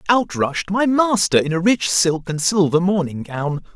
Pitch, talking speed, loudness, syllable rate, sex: 180 Hz, 190 wpm, -18 LUFS, 4.3 syllables/s, male